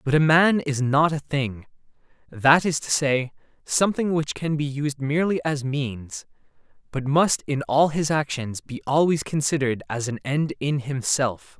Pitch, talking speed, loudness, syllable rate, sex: 145 Hz, 170 wpm, -23 LUFS, 4.5 syllables/s, male